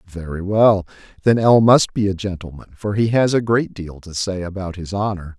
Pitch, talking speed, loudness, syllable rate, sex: 100 Hz, 200 wpm, -18 LUFS, 5.0 syllables/s, male